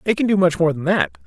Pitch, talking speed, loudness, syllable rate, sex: 160 Hz, 330 wpm, -18 LUFS, 6.1 syllables/s, male